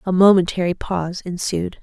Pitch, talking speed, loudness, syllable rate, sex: 180 Hz, 130 wpm, -19 LUFS, 5.4 syllables/s, female